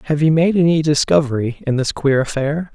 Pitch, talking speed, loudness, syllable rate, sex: 150 Hz, 195 wpm, -16 LUFS, 5.6 syllables/s, male